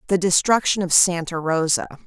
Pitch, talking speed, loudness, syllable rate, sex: 175 Hz, 145 wpm, -19 LUFS, 5.3 syllables/s, female